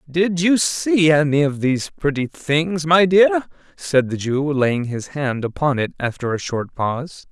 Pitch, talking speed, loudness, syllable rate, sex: 150 Hz, 180 wpm, -19 LUFS, 4.2 syllables/s, male